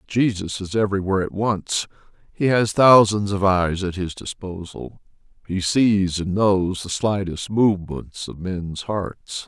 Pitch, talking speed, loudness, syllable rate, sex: 95 Hz, 145 wpm, -21 LUFS, 4.0 syllables/s, male